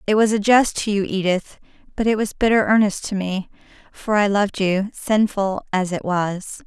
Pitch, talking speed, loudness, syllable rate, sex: 205 Hz, 200 wpm, -20 LUFS, 4.8 syllables/s, female